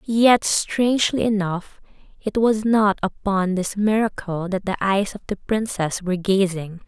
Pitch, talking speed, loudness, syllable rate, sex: 200 Hz, 150 wpm, -21 LUFS, 4.3 syllables/s, female